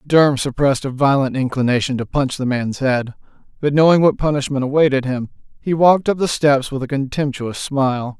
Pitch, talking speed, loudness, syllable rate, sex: 135 Hz, 185 wpm, -17 LUFS, 5.6 syllables/s, male